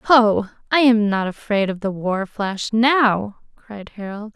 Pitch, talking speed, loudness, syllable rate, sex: 215 Hz, 165 wpm, -19 LUFS, 3.7 syllables/s, female